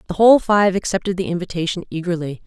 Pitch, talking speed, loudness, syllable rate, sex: 180 Hz, 170 wpm, -18 LUFS, 6.9 syllables/s, female